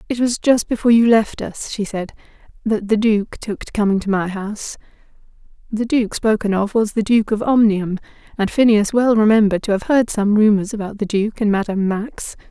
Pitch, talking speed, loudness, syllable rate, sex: 215 Hz, 200 wpm, -17 LUFS, 5.4 syllables/s, female